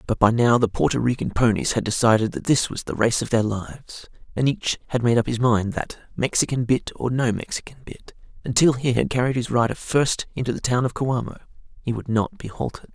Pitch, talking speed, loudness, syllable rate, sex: 120 Hz, 225 wpm, -22 LUFS, 5.7 syllables/s, male